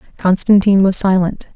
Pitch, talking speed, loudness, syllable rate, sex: 190 Hz, 115 wpm, -13 LUFS, 5.0 syllables/s, female